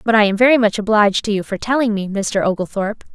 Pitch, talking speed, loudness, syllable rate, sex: 210 Hz, 250 wpm, -17 LUFS, 6.8 syllables/s, female